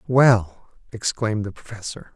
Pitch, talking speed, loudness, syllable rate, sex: 110 Hz, 110 wpm, -22 LUFS, 4.6 syllables/s, male